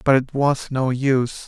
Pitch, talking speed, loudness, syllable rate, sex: 130 Hz, 205 wpm, -20 LUFS, 4.5 syllables/s, male